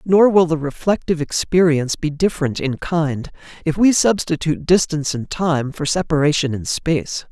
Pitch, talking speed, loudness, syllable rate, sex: 160 Hz, 155 wpm, -18 LUFS, 5.3 syllables/s, male